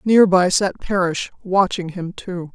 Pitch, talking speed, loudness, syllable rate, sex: 185 Hz, 165 wpm, -19 LUFS, 4.0 syllables/s, female